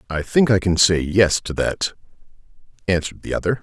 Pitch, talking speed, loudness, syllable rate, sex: 95 Hz, 180 wpm, -19 LUFS, 5.6 syllables/s, male